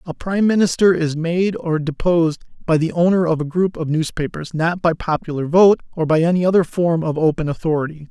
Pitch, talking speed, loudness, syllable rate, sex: 165 Hz, 200 wpm, -18 LUFS, 5.7 syllables/s, male